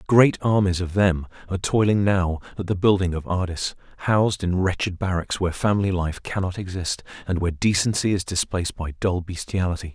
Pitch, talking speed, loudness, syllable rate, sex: 95 Hz, 175 wpm, -23 LUFS, 5.7 syllables/s, male